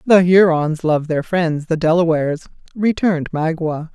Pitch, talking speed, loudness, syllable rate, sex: 165 Hz, 135 wpm, -17 LUFS, 4.6 syllables/s, female